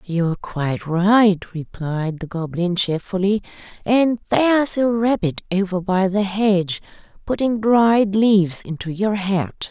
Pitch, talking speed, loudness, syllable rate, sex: 195 Hz, 130 wpm, -19 LUFS, 4.0 syllables/s, female